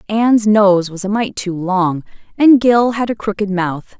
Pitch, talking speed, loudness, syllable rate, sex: 205 Hz, 195 wpm, -15 LUFS, 4.3 syllables/s, female